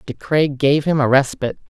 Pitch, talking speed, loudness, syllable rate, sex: 140 Hz, 200 wpm, -17 LUFS, 5.1 syllables/s, female